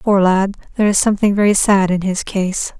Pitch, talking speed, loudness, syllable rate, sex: 195 Hz, 215 wpm, -15 LUFS, 5.6 syllables/s, female